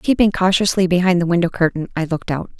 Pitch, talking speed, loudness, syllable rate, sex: 180 Hz, 210 wpm, -17 LUFS, 6.5 syllables/s, female